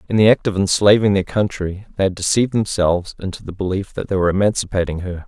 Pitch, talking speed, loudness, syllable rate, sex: 95 Hz, 215 wpm, -18 LUFS, 6.7 syllables/s, male